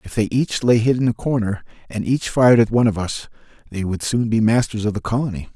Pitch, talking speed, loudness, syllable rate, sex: 110 Hz, 250 wpm, -19 LUFS, 6.2 syllables/s, male